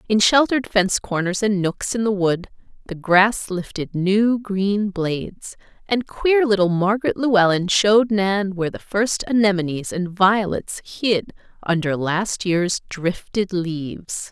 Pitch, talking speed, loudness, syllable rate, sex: 195 Hz, 145 wpm, -20 LUFS, 4.1 syllables/s, female